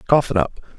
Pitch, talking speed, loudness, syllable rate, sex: 115 Hz, 230 wpm, -20 LUFS, 6.7 syllables/s, male